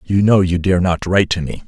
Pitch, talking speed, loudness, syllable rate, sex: 90 Hz, 285 wpm, -16 LUFS, 5.8 syllables/s, male